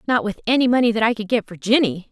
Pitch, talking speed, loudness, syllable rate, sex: 220 Hz, 285 wpm, -19 LUFS, 6.9 syllables/s, female